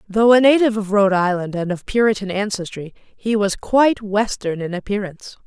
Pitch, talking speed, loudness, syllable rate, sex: 205 Hz, 175 wpm, -18 LUFS, 5.6 syllables/s, female